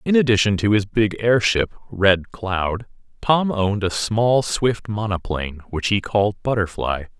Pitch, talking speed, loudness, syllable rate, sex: 105 Hz, 150 wpm, -20 LUFS, 4.4 syllables/s, male